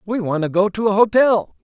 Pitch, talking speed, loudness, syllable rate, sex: 200 Hz, 245 wpm, -17 LUFS, 5.5 syllables/s, male